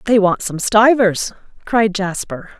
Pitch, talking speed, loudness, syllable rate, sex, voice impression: 205 Hz, 140 wpm, -16 LUFS, 3.9 syllables/s, female, feminine, adult-like, slightly tensed, powerful, slightly soft, clear, fluent, intellectual, friendly, elegant, lively, sharp